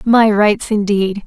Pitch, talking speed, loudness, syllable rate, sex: 210 Hz, 140 wpm, -14 LUFS, 3.4 syllables/s, female